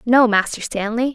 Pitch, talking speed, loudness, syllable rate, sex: 230 Hz, 160 wpm, -18 LUFS, 4.8 syllables/s, female